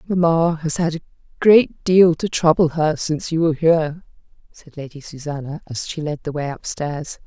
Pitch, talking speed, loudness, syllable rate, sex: 160 Hz, 180 wpm, -19 LUFS, 4.9 syllables/s, female